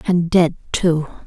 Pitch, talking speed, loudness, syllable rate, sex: 170 Hz, 145 wpm, -18 LUFS, 3.8 syllables/s, female